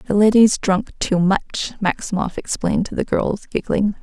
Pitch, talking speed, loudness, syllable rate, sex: 200 Hz, 165 wpm, -19 LUFS, 4.8 syllables/s, female